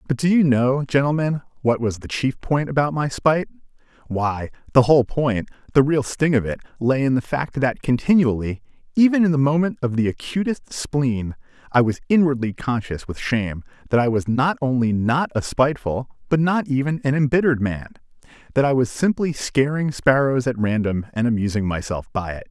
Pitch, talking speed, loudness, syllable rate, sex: 130 Hz, 185 wpm, -21 LUFS, 5.3 syllables/s, male